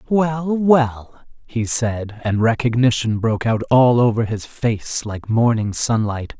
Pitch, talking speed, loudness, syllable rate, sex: 120 Hz, 140 wpm, -18 LUFS, 3.8 syllables/s, male